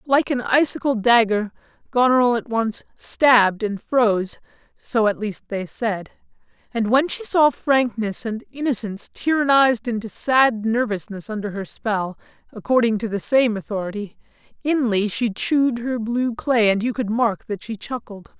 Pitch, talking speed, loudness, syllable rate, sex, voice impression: 230 Hz, 155 wpm, -21 LUFS, 4.6 syllables/s, male, gender-neutral, adult-like, fluent, unique, slightly intense